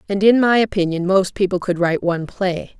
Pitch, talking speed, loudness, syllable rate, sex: 190 Hz, 215 wpm, -18 LUFS, 5.9 syllables/s, female